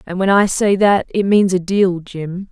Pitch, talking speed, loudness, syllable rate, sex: 190 Hz, 240 wpm, -15 LUFS, 4.2 syllables/s, female